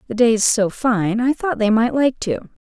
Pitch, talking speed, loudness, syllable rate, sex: 230 Hz, 230 wpm, -18 LUFS, 4.5 syllables/s, female